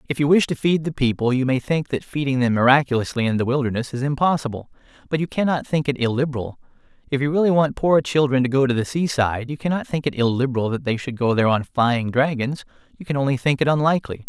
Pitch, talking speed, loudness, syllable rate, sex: 135 Hz, 225 wpm, -21 LUFS, 6.5 syllables/s, male